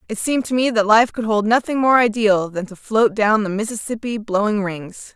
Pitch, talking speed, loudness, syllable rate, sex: 215 Hz, 220 wpm, -18 LUFS, 5.2 syllables/s, female